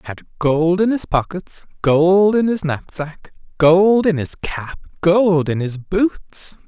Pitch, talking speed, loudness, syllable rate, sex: 170 Hz, 160 wpm, -17 LUFS, 3.5 syllables/s, male